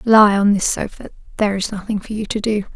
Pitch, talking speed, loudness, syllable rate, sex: 205 Hz, 220 wpm, -18 LUFS, 6.2 syllables/s, female